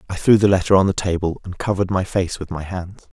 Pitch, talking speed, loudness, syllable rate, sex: 95 Hz, 265 wpm, -19 LUFS, 6.3 syllables/s, male